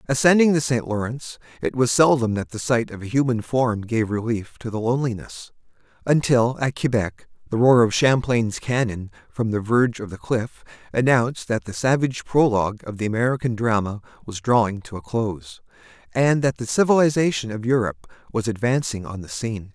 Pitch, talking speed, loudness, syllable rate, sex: 115 Hz, 175 wpm, -21 LUFS, 5.5 syllables/s, male